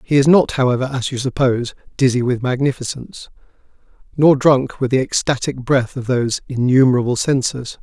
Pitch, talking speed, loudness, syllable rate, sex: 130 Hz, 155 wpm, -17 LUFS, 5.7 syllables/s, male